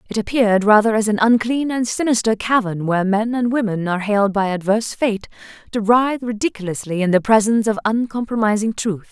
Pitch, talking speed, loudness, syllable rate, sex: 220 Hz, 180 wpm, -18 LUFS, 6.0 syllables/s, female